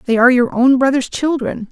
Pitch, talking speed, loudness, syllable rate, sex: 255 Hz, 210 wpm, -14 LUFS, 5.8 syllables/s, female